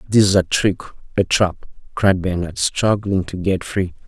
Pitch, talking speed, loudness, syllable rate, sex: 95 Hz, 160 wpm, -19 LUFS, 4.4 syllables/s, male